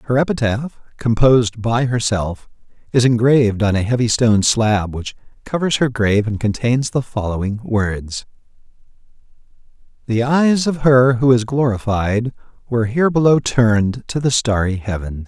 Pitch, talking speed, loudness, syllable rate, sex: 115 Hz, 140 wpm, -17 LUFS, 4.9 syllables/s, male